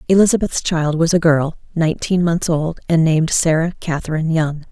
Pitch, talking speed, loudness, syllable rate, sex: 165 Hz, 165 wpm, -17 LUFS, 5.5 syllables/s, female